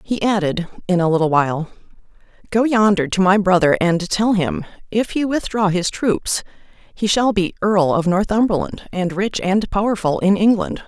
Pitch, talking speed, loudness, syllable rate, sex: 195 Hz, 170 wpm, -18 LUFS, 4.8 syllables/s, female